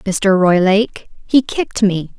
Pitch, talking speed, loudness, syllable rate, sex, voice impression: 200 Hz, 135 wpm, -15 LUFS, 4.1 syllables/s, female, feminine, very adult-like, slightly clear, slightly intellectual, slightly elegant